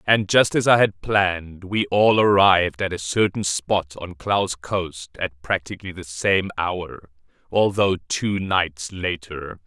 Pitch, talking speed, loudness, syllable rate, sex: 90 Hz, 155 wpm, -21 LUFS, 3.8 syllables/s, male